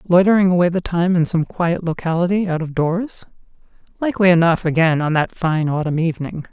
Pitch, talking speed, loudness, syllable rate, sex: 170 Hz, 175 wpm, -18 LUFS, 5.7 syllables/s, female